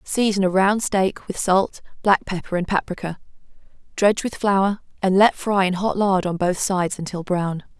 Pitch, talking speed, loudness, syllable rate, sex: 190 Hz, 185 wpm, -21 LUFS, 4.8 syllables/s, female